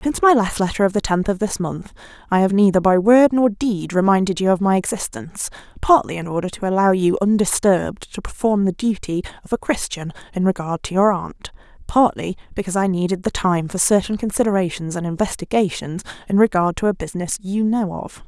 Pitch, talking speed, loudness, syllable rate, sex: 195 Hz, 195 wpm, -19 LUFS, 5.8 syllables/s, female